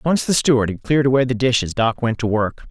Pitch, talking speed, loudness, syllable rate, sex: 120 Hz, 265 wpm, -18 LUFS, 6.2 syllables/s, male